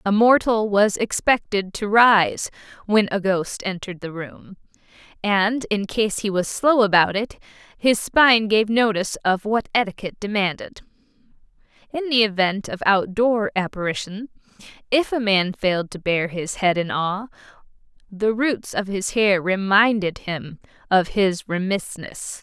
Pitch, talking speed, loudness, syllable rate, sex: 205 Hz, 145 wpm, -20 LUFS, 4.4 syllables/s, female